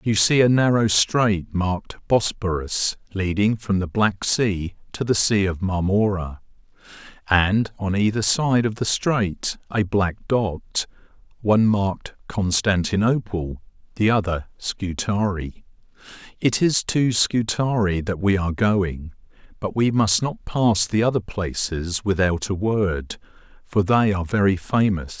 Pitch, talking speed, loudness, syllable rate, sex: 100 Hz, 135 wpm, -21 LUFS, 4.0 syllables/s, male